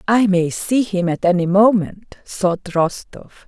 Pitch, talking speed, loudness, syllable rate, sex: 190 Hz, 155 wpm, -17 LUFS, 3.7 syllables/s, female